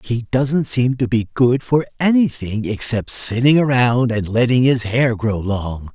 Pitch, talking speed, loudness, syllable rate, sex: 120 Hz, 170 wpm, -17 LUFS, 4.1 syllables/s, male